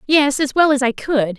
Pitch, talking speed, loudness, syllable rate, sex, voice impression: 270 Hz, 260 wpm, -16 LUFS, 4.9 syllables/s, female, very feminine, young, very thin, very tensed, powerful, very bright, very hard, very clear, fluent, slightly cute, cool, very intellectual, refreshing, sincere, very calm, friendly, reassuring, very unique, wild, sweet, slightly lively, kind, slightly intense, slightly sharp, modest